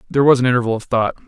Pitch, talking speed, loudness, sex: 125 Hz, 285 wpm, -16 LUFS, male